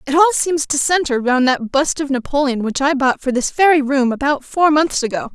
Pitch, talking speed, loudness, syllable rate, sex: 280 Hz, 235 wpm, -16 LUFS, 5.4 syllables/s, female